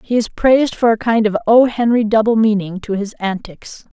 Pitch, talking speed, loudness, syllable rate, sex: 220 Hz, 210 wpm, -15 LUFS, 5.1 syllables/s, female